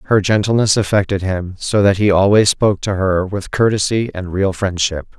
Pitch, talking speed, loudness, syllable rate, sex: 100 Hz, 185 wpm, -16 LUFS, 5.0 syllables/s, male